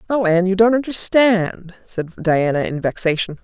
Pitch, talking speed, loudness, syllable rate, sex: 190 Hz, 155 wpm, -17 LUFS, 4.9 syllables/s, female